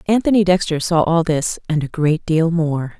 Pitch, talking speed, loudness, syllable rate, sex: 165 Hz, 180 wpm, -17 LUFS, 4.7 syllables/s, female